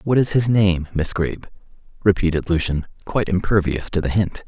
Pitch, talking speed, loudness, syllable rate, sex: 90 Hz, 175 wpm, -20 LUFS, 5.3 syllables/s, male